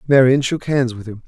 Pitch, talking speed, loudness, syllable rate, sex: 125 Hz, 235 wpm, -17 LUFS, 5.5 syllables/s, male